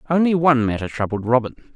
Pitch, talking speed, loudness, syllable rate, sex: 130 Hz, 170 wpm, -19 LUFS, 6.5 syllables/s, male